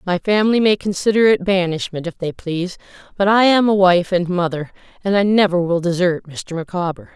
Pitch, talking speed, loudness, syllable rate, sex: 185 Hz, 195 wpm, -17 LUFS, 5.5 syllables/s, female